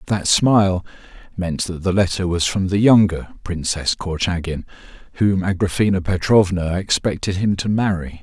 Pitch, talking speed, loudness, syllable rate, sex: 95 Hz, 140 wpm, -19 LUFS, 4.8 syllables/s, male